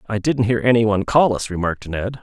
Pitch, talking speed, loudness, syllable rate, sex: 110 Hz, 245 wpm, -18 LUFS, 6.3 syllables/s, male